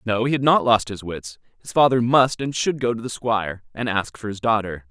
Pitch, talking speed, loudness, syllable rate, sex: 115 Hz, 255 wpm, -21 LUFS, 5.4 syllables/s, male